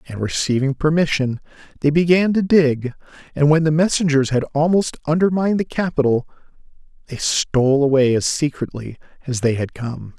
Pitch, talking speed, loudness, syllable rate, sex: 145 Hz, 145 wpm, -18 LUFS, 5.3 syllables/s, male